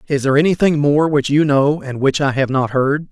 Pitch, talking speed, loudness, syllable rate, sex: 145 Hz, 250 wpm, -16 LUFS, 5.5 syllables/s, male